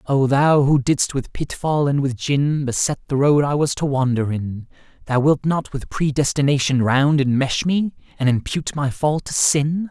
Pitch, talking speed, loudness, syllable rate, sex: 140 Hz, 190 wpm, -19 LUFS, 4.5 syllables/s, male